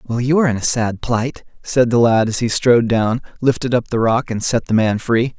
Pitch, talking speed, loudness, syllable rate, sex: 120 Hz, 255 wpm, -17 LUFS, 5.3 syllables/s, male